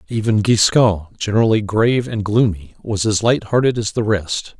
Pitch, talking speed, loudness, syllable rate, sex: 105 Hz, 170 wpm, -17 LUFS, 5.1 syllables/s, male